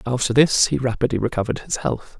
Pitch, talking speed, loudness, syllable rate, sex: 120 Hz, 190 wpm, -20 LUFS, 6.3 syllables/s, male